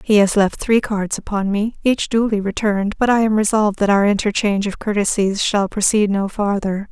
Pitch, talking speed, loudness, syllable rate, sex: 205 Hz, 210 wpm, -18 LUFS, 5.4 syllables/s, female